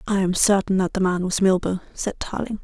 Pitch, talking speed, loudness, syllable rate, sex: 195 Hz, 230 wpm, -21 LUFS, 5.6 syllables/s, female